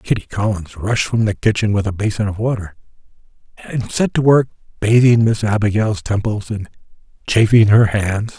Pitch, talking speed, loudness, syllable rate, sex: 105 Hz, 165 wpm, -16 LUFS, 5.0 syllables/s, male